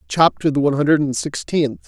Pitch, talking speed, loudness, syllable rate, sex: 145 Hz, 190 wpm, -18 LUFS, 5.9 syllables/s, male